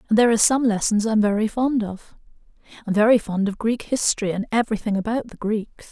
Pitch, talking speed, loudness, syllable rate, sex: 220 Hz, 205 wpm, -21 LUFS, 6.2 syllables/s, female